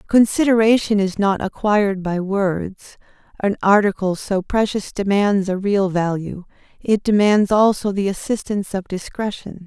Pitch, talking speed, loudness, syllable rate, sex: 200 Hz, 130 wpm, -19 LUFS, 4.5 syllables/s, female